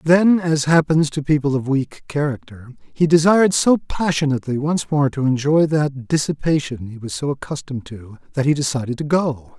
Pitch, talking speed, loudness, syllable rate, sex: 145 Hz, 175 wpm, -19 LUFS, 5.2 syllables/s, male